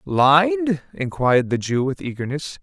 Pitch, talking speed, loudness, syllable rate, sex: 135 Hz, 135 wpm, -20 LUFS, 4.6 syllables/s, male